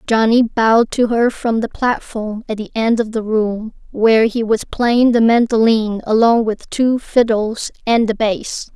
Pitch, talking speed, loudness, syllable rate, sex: 225 Hz, 180 wpm, -16 LUFS, 4.2 syllables/s, female